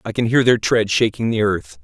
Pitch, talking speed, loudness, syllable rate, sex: 110 Hz, 260 wpm, -17 LUFS, 5.2 syllables/s, male